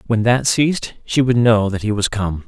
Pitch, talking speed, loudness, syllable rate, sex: 115 Hz, 245 wpm, -17 LUFS, 4.9 syllables/s, male